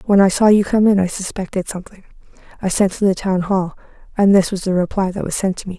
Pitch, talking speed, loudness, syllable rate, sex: 190 Hz, 260 wpm, -17 LUFS, 6.4 syllables/s, female